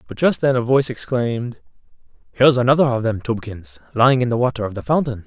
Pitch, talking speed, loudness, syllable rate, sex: 120 Hz, 205 wpm, -18 LUFS, 6.8 syllables/s, male